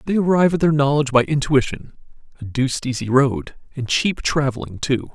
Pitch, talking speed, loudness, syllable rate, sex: 135 Hz, 165 wpm, -19 LUFS, 5.7 syllables/s, male